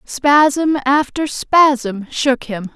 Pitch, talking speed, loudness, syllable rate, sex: 270 Hz, 110 wpm, -15 LUFS, 2.3 syllables/s, female